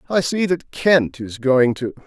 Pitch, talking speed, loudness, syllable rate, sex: 145 Hz, 205 wpm, -19 LUFS, 3.7 syllables/s, male